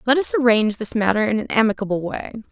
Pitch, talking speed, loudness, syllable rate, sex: 225 Hz, 215 wpm, -19 LUFS, 6.9 syllables/s, female